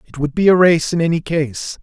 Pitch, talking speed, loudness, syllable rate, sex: 160 Hz, 265 wpm, -16 LUFS, 5.3 syllables/s, male